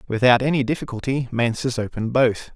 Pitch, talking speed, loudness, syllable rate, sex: 125 Hz, 140 wpm, -21 LUFS, 6.0 syllables/s, male